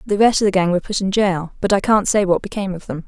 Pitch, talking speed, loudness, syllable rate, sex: 195 Hz, 330 wpm, -18 LUFS, 6.9 syllables/s, female